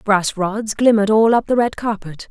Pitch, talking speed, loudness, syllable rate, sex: 210 Hz, 210 wpm, -17 LUFS, 5.0 syllables/s, female